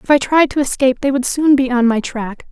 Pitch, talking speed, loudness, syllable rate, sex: 265 Hz, 285 wpm, -15 LUFS, 6.0 syllables/s, female